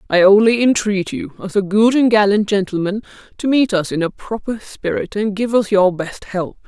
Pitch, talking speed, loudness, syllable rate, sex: 205 Hz, 205 wpm, -17 LUFS, 5.1 syllables/s, female